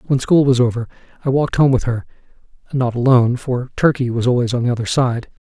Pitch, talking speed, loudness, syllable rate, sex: 125 Hz, 195 wpm, -17 LUFS, 6.3 syllables/s, male